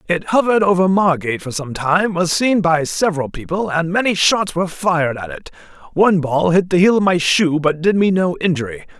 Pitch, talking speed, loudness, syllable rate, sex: 175 Hz, 215 wpm, -16 LUFS, 5.6 syllables/s, male